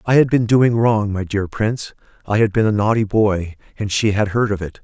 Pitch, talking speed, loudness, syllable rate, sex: 105 Hz, 235 wpm, -18 LUFS, 5.3 syllables/s, male